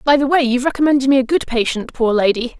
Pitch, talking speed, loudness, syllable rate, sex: 260 Hz, 255 wpm, -16 LUFS, 6.9 syllables/s, female